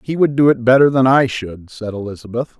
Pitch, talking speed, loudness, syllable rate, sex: 125 Hz, 230 wpm, -15 LUFS, 5.7 syllables/s, male